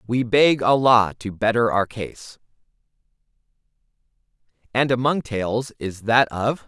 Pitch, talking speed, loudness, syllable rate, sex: 115 Hz, 115 wpm, -20 LUFS, 3.9 syllables/s, male